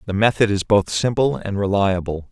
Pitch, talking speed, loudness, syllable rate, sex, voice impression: 100 Hz, 180 wpm, -19 LUFS, 5.1 syllables/s, male, very masculine, very adult-like, very middle-aged, very thick, slightly tensed, powerful, slightly bright, slightly soft, clear, fluent, slightly raspy, very cool, very intellectual, refreshing, very sincere, very calm, very mature, friendly, reassuring, very unique, elegant, very wild, very sweet, slightly lively, very kind, slightly modest